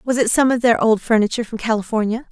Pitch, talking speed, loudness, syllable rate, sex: 230 Hz, 235 wpm, -17 LUFS, 6.6 syllables/s, female